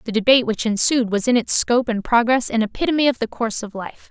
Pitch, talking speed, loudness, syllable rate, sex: 230 Hz, 250 wpm, -18 LUFS, 6.6 syllables/s, female